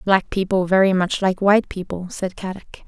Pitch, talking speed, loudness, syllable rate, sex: 190 Hz, 190 wpm, -20 LUFS, 5.4 syllables/s, female